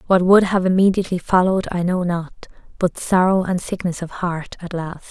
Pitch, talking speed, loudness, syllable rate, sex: 180 Hz, 190 wpm, -19 LUFS, 5.3 syllables/s, female